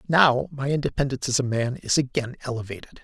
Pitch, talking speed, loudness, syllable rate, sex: 130 Hz, 180 wpm, -24 LUFS, 6.5 syllables/s, male